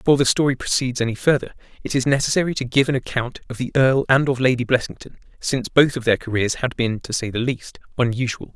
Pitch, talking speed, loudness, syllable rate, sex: 125 Hz, 225 wpm, -20 LUFS, 6.4 syllables/s, male